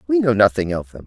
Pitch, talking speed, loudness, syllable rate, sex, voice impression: 120 Hz, 280 wpm, -18 LUFS, 6.6 syllables/s, male, masculine, adult-like, slightly cool, refreshing, sincere